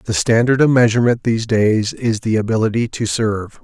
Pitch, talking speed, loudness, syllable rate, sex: 115 Hz, 180 wpm, -16 LUFS, 5.6 syllables/s, male